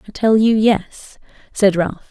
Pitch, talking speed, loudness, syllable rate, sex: 210 Hz, 170 wpm, -16 LUFS, 4.1 syllables/s, female